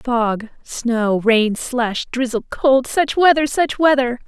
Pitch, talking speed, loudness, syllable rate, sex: 250 Hz, 125 wpm, -17 LUFS, 3.3 syllables/s, female